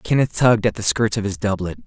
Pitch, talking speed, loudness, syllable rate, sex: 105 Hz, 260 wpm, -19 LUFS, 6.2 syllables/s, male